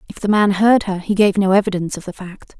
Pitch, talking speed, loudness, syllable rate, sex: 195 Hz, 275 wpm, -16 LUFS, 6.2 syllables/s, female